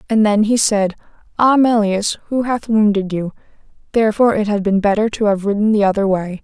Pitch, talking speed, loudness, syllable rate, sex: 210 Hz, 195 wpm, -16 LUFS, 5.6 syllables/s, female